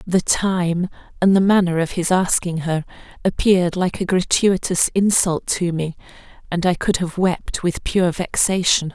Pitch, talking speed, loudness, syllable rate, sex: 180 Hz, 160 wpm, -19 LUFS, 4.3 syllables/s, female